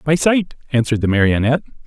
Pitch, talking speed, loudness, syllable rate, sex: 135 Hz, 160 wpm, -17 LUFS, 7.1 syllables/s, male